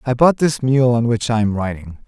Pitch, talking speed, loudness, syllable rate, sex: 120 Hz, 260 wpm, -17 LUFS, 5.3 syllables/s, male